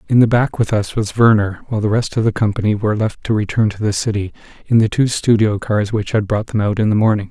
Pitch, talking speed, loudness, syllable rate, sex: 110 Hz, 270 wpm, -16 LUFS, 6.2 syllables/s, male